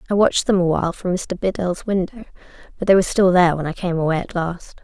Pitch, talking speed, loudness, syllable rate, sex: 180 Hz, 235 wpm, -19 LUFS, 6.6 syllables/s, female